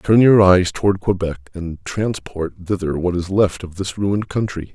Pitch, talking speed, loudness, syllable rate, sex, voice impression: 95 Hz, 190 wpm, -18 LUFS, 4.5 syllables/s, male, very masculine, slightly middle-aged, thick, cool, sincere, calm, slightly mature, wild